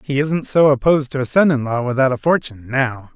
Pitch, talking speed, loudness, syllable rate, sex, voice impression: 135 Hz, 245 wpm, -17 LUFS, 6.0 syllables/s, male, masculine, adult-like, tensed, powerful, bright, clear, fluent, intellectual, slightly refreshing, calm, friendly, reassuring, kind, slightly modest